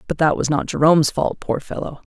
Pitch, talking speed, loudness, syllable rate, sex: 150 Hz, 230 wpm, -19 LUFS, 5.9 syllables/s, female